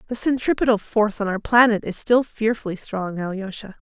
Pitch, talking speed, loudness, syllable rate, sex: 215 Hz, 170 wpm, -21 LUFS, 5.6 syllables/s, female